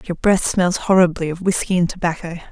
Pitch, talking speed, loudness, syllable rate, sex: 175 Hz, 190 wpm, -18 LUFS, 5.7 syllables/s, female